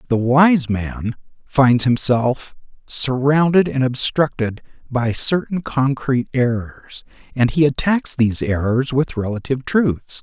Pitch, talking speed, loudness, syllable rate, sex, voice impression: 130 Hz, 115 wpm, -18 LUFS, 4.0 syllables/s, male, very masculine, very adult-like, old, very thick, slightly relaxed, powerful, slightly bright, soft, muffled, fluent, slightly raspy, very cool, intellectual, sincere, very calm, very mature, friendly, very reassuring, very unique, elegant, wild, very sweet, slightly lively, very kind, slightly modest